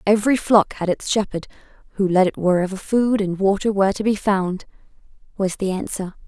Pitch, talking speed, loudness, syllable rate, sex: 195 Hz, 180 wpm, -20 LUFS, 5.6 syllables/s, female